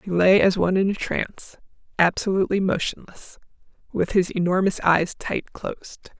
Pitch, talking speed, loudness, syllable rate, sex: 185 Hz, 145 wpm, -22 LUFS, 5.1 syllables/s, female